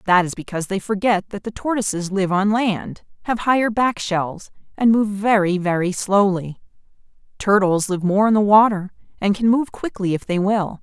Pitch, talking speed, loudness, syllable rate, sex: 200 Hz, 185 wpm, -19 LUFS, 5.0 syllables/s, female